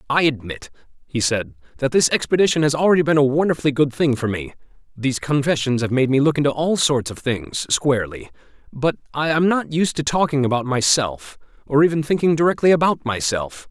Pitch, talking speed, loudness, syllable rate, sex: 140 Hz, 175 wpm, -19 LUFS, 5.7 syllables/s, male